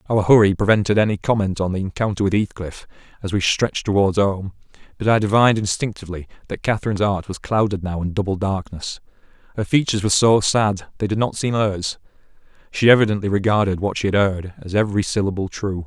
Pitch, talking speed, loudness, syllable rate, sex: 100 Hz, 185 wpm, -19 LUFS, 6.3 syllables/s, male